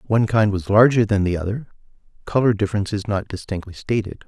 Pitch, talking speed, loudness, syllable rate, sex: 105 Hz, 170 wpm, -20 LUFS, 6.0 syllables/s, male